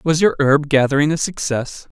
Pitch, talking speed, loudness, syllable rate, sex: 145 Hz, 180 wpm, -17 LUFS, 5.0 syllables/s, male